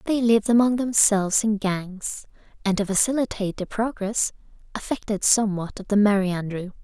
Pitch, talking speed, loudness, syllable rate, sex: 210 Hz, 150 wpm, -22 LUFS, 5.5 syllables/s, female